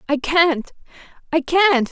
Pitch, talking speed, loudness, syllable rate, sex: 310 Hz, 125 wpm, -18 LUFS, 3.3 syllables/s, female